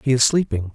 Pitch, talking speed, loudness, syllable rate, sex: 125 Hz, 245 wpm, -19 LUFS, 6.3 syllables/s, male